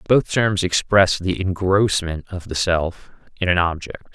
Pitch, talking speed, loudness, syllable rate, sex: 90 Hz, 160 wpm, -19 LUFS, 4.1 syllables/s, male